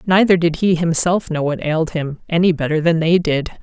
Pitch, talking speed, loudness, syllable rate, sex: 165 Hz, 215 wpm, -17 LUFS, 5.4 syllables/s, female